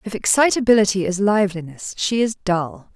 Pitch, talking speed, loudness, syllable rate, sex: 195 Hz, 140 wpm, -18 LUFS, 5.5 syllables/s, female